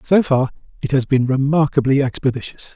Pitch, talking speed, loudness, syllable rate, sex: 135 Hz, 150 wpm, -17 LUFS, 5.6 syllables/s, male